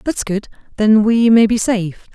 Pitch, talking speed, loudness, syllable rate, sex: 220 Hz, 195 wpm, -14 LUFS, 5.1 syllables/s, female